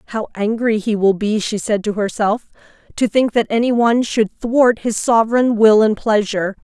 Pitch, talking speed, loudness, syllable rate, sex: 220 Hz, 190 wpm, -16 LUFS, 5.0 syllables/s, female